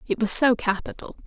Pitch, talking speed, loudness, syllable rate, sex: 225 Hz, 190 wpm, -20 LUFS, 5.7 syllables/s, female